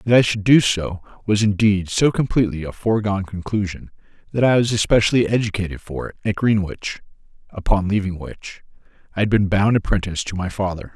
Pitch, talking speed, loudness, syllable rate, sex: 100 Hz, 175 wpm, -20 LUFS, 5.9 syllables/s, male